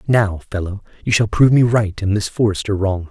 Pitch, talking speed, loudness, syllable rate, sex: 105 Hz, 215 wpm, -17 LUFS, 5.6 syllables/s, male